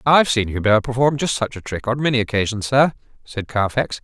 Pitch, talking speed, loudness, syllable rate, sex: 120 Hz, 225 wpm, -19 LUFS, 5.8 syllables/s, male